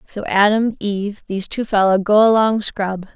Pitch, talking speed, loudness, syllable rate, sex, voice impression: 205 Hz, 170 wpm, -17 LUFS, 4.8 syllables/s, female, very feminine, very adult-like, thin, tensed, slightly powerful, bright, soft, clear, fluent, slightly raspy, cute, intellectual, very refreshing, sincere, calm, very friendly, reassuring, unique, elegant, slightly wild, sweet, lively, kind, slightly modest, slightly light